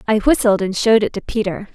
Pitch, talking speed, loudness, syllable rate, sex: 210 Hz, 240 wpm, -17 LUFS, 6.4 syllables/s, female